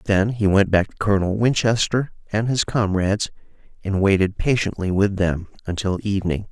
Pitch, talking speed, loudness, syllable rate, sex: 100 Hz, 155 wpm, -21 LUFS, 5.4 syllables/s, male